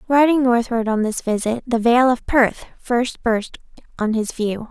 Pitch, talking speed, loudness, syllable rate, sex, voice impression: 235 Hz, 180 wpm, -19 LUFS, 4.3 syllables/s, female, feminine, young, tensed, bright, clear, cute, friendly, sweet, lively